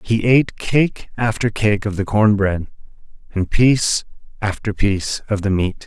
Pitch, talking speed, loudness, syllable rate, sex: 105 Hz, 165 wpm, -18 LUFS, 4.5 syllables/s, male